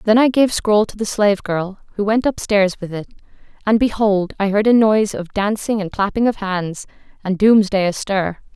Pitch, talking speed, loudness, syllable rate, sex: 205 Hz, 195 wpm, -17 LUFS, 5.1 syllables/s, female